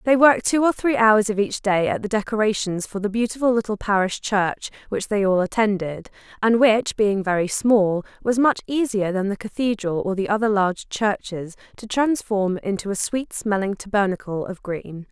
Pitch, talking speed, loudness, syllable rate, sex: 210 Hz, 185 wpm, -21 LUFS, 5.0 syllables/s, female